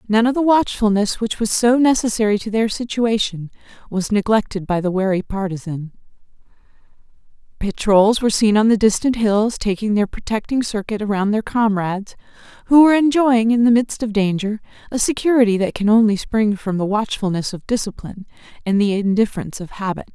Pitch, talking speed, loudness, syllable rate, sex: 215 Hz, 165 wpm, -18 LUFS, 5.6 syllables/s, female